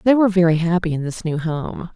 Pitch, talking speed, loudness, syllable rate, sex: 175 Hz, 245 wpm, -19 LUFS, 6.1 syllables/s, female